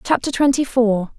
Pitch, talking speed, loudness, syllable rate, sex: 250 Hz, 150 wpm, -18 LUFS, 4.6 syllables/s, female